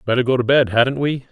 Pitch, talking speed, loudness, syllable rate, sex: 125 Hz, 275 wpm, -17 LUFS, 5.9 syllables/s, male